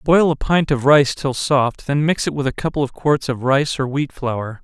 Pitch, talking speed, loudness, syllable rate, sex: 140 Hz, 245 wpm, -18 LUFS, 4.6 syllables/s, male